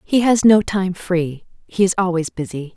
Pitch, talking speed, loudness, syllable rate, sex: 185 Hz, 195 wpm, -18 LUFS, 4.6 syllables/s, female